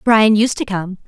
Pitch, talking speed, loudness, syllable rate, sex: 210 Hz, 225 wpm, -15 LUFS, 4.4 syllables/s, female